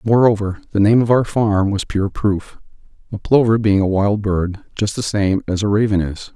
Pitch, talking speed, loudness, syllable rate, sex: 105 Hz, 210 wpm, -17 LUFS, 4.8 syllables/s, male